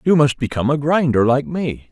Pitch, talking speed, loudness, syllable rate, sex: 145 Hz, 220 wpm, -17 LUFS, 5.8 syllables/s, male